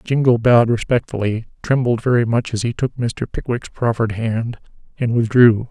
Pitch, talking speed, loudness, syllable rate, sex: 115 Hz, 160 wpm, -18 LUFS, 5.2 syllables/s, male